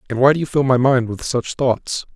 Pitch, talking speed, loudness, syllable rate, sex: 130 Hz, 280 wpm, -18 LUFS, 5.4 syllables/s, male